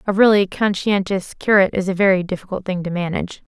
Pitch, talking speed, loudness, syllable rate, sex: 190 Hz, 190 wpm, -18 LUFS, 6.4 syllables/s, female